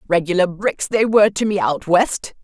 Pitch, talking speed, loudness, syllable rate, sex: 190 Hz, 195 wpm, -17 LUFS, 5.0 syllables/s, female